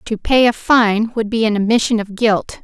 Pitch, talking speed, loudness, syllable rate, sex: 220 Hz, 230 wpm, -15 LUFS, 4.8 syllables/s, female